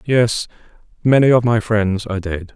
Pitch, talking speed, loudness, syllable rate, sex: 110 Hz, 165 wpm, -17 LUFS, 4.8 syllables/s, male